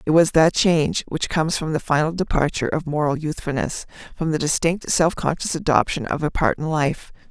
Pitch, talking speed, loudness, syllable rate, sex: 155 Hz, 190 wpm, -21 LUFS, 5.6 syllables/s, female